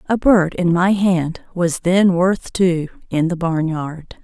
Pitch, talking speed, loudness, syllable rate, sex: 175 Hz, 155 wpm, -17 LUFS, 3.5 syllables/s, female